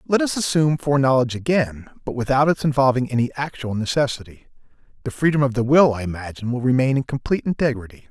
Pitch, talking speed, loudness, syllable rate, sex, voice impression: 130 Hz, 180 wpm, -20 LUFS, 6.8 syllables/s, male, masculine, adult-like, slightly thick, tensed, powerful, raspy, cool, mature, friendly, wild, lively, slightly sharp